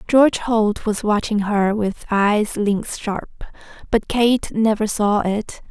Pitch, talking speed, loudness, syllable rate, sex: 215 Hz, 145 wpm, -19 LUFS, 3.5 syllables/s, female